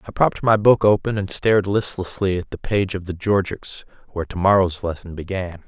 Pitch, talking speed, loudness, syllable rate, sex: 95 Hz, 200 wpm, -20 LUFS, 5.6 syllables/s, male